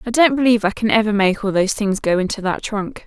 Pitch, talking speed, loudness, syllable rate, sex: 210 Hz, 275 wpm, -18 LUFS, 6.4 syllables/s, female